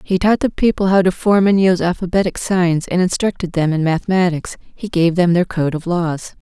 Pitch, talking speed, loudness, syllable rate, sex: 180 Hz, 215 wpm, -16 LUFS, 5.4 syllables/s, female